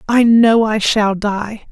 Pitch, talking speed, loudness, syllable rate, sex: 215 Hz, 175 wpm, -14 LUFS, 3.3 syllables/s, female